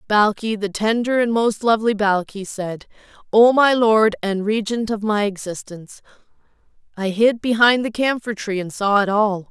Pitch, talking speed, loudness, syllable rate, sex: 215 Hz, 150 wpm, -19 LUFS, 4.7 syllables/s, female